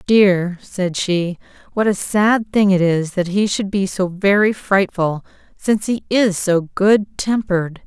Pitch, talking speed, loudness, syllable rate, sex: 195 Hz, 170 wpm, -17 LUFS, 3.9 syllables/s, female